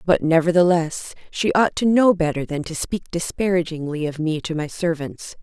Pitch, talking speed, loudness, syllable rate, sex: 170 Hz, 175 wpm, -21 LUFS, 5.0 syllables/s, female